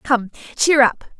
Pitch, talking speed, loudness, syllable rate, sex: 255 Hz, 150 wpm, -17 LUFS, 3.9 syllables/s, female